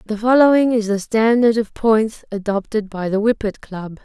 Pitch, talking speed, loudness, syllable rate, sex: 220 Hz, 180 wpm, -17 LUFS, 4.8 syllables/s, female